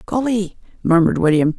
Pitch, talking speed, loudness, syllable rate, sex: 185 Hz, 115 wpm, -17 LUFS, 5.7 syllables/s, female